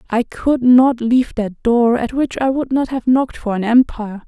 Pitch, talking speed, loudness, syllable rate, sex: 245 Hz, 225 wpm, -16 LUFS, 5.1 syllables/s, female